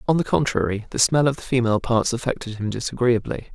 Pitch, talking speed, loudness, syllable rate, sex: 120 Hz, 205 wpm, -22 LUFS, 6.4 syllables/s, male